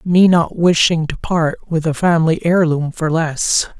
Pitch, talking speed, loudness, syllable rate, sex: 165 Hz, 175 wpm, -15 LUFS, 4.1 syllables/s, male